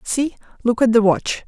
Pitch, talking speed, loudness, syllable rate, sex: 240 Hz, 205 wpm, -18 LUFS, 4.7 syllables/s, female